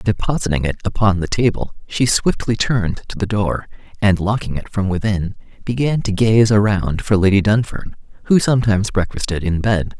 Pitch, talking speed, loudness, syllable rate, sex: 105 Hz, 170 wpm, -18 LUFS, 5.3 syllables/s, male